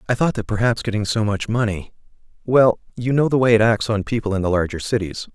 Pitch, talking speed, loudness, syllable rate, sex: 110 Hz, 225 wpm, -19 LUFS, 6.1 syllables/s, male